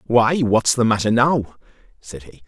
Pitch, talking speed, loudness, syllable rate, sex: 115 Hz, 170 wpm, -17 LUFS, 4.2 syllables/s, male